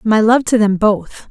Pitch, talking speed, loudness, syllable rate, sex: 215 Hz, 230 wpm, -14 LUFS, 4.1 syllables/s, female